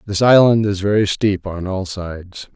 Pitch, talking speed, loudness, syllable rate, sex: 100 Hz, 190 wpm, -16 LUFS, 4.6 syllables/s, male